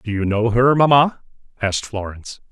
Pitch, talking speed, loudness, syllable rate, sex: 120 Hz, 165 wpm, -18 LUFS, 5.4 syllables/s, male